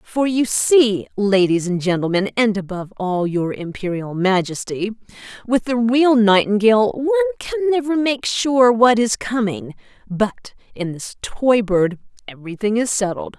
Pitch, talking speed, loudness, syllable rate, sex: 220 Hz, 145 wpm, -18 LUFS, 4.6 syllables/s, female